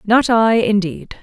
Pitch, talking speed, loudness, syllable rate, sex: 210 Hz, 145 wpm, -15 LUFS, 3.7 syllables/s, female